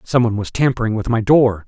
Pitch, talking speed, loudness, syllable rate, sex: 115 Hz, 215 wpm, -17 LUFS, 6.4 syllables/s, male